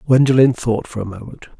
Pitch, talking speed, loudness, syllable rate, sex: 120 Hz, 190 wpm, -16 LUFS, 5.8 syllables/s, male